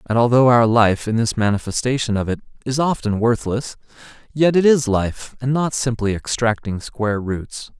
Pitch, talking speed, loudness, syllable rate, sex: 115 Hz, 170 wpm, -19 LUFS, 4.9 syllables/s, male